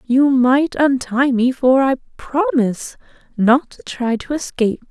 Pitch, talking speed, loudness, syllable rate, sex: 255 Hz, 145 wpm, -17 LUFS, 3.9 syllables/s, female